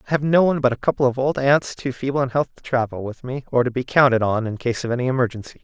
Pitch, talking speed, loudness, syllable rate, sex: 130 Hz, 300 wpm, -20 LUFS, 6.9 syllables/s, male